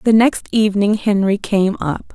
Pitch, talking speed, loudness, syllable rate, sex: 205 Hz, 170 wpm, -16 LUFS, 4.5 syllables/s, female